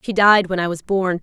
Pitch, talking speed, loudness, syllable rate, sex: 185 Hz, 295 wpm, -17 LUFS, 5.3 syllables/s, female